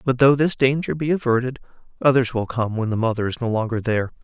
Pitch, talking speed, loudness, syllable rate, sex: 125 Hz, 225 wpm, -21 LUFS, 6.3 syllables/s, male